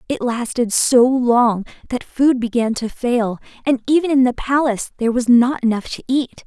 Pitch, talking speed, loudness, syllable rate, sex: 245 Hz, 185 wpm, -17 LUFS, 4.9 syllables/s, female